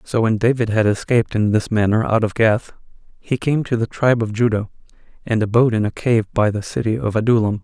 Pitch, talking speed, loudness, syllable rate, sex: 110 Hz, 220 wpm, -18 LUFS, 6.0 syllables/s, male